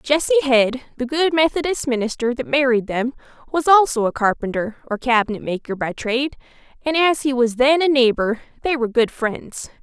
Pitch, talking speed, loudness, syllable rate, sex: 255 Hz, 175 wpm, -19 LUFS, 5.3 syllables/s, female